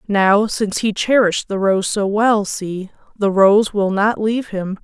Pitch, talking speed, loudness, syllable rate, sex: 205 Hz, 185 wpm, -17 LUFS, 4.3 syllables/s, female